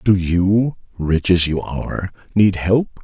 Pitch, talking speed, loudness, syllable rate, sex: 95 Hz, 160 wpm, -18 LUFS, 3.5 syllables/s, male